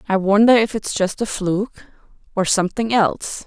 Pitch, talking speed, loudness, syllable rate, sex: 205 Hz, 155 wpm, -18 LUFS, 5.2 syllables/s, female